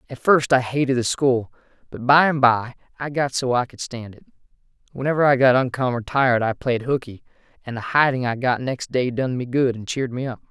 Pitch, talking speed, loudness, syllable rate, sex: 125 Hz, 225 wpm, -20 LUFS, 5.7 syllables/s, male